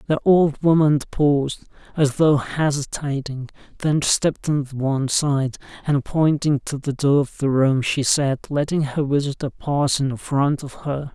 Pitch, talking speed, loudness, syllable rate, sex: 140 Hz, 160 wpm, -20 LUFS, 4.3 syllables/s, male